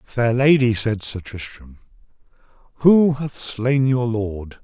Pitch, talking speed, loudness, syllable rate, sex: 120 Hz, 130 wpm, -19 LUFS, 3.5 syllables/s, male